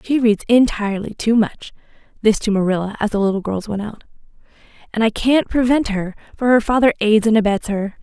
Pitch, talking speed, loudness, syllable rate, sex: 220 Hz, 185 wpm, -17 LUFS, 6.0 syllables/s, female